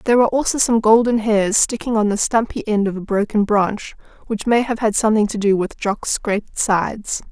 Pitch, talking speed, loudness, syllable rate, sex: 215 Hz, 215 wpm, -18 LUFS, 5.4 syllables/s, female